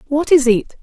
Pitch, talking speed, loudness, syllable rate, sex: 275 Hz, 220 wpm, -14 LUFS, 4.8 syllables/s, female